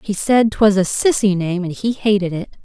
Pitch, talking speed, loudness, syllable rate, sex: 200 Hz, 225 wpm, -17 LUFS, 4.8 syllables/s, female